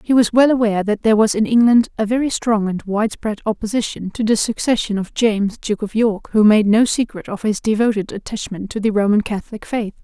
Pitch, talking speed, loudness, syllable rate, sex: 215 Hz, 215 wpm, -17 LUFS, 5.9 syllables/s, female